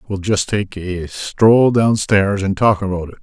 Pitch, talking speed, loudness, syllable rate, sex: 100 Hz, 185 wpm, -16 LUFS, 4.0 syllables/s, male